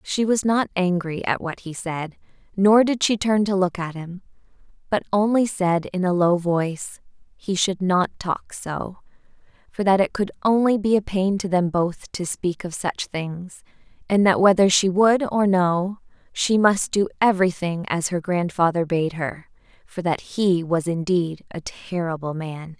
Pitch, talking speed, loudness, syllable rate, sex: 185 Hz, 180 wpm, -21 LUFS, 4.3 syllables/s, female